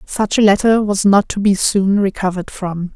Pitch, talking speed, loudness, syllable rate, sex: 200 Hz, 205 wpm, -15 LUFS, 4.9 syllables/s, female